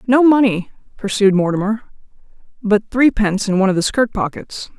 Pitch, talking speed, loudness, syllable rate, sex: 215 Hz, 150 wpm, -16 LUFS, 5.6 syllables/s, female